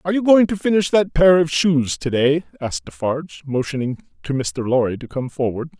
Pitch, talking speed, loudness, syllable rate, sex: 150 Hz, 205 wpm, -19 LUFS, 5.6 syllables/s, male